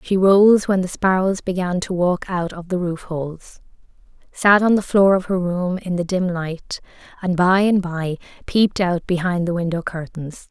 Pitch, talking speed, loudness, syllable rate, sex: 180 Hz, 195 wpm, -19 LUFS, 4.6 syllables/s, female